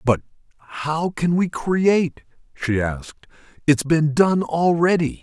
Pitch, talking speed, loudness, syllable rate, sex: 155 Hz, 115 wpm, -20 LUFS, 3.9 syllables/s, male